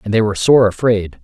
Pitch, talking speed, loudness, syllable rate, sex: 110 Hz, 245 wpm, -14 LUFS, 6.2 syllables/s, male